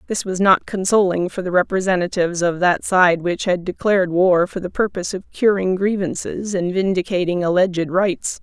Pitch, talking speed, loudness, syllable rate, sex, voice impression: 185 Hz, 170 wpm, -18 LUFS, 5.3 syllables/s, female, very feminine, middle-aged, slightly tensed, slightly weak, bright, slightly soft, clear, fluent, cute, slightly cool, very intellectual, very refreshing, sincere, calm, friendly, reassuring, very unique, elegant, wild, slightly sweet, lively, strict, slightly intense